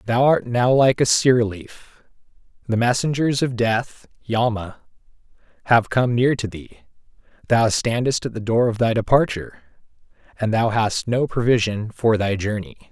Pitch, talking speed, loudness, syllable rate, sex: 115 Hz, 155 wpm, -20 LUFS, 4.6 syllables/s, male